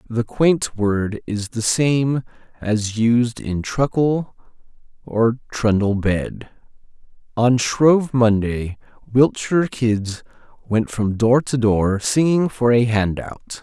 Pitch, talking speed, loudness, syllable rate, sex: 115 Hz, 120 wpm, -19 LUFS, 3.3 syllables/s, male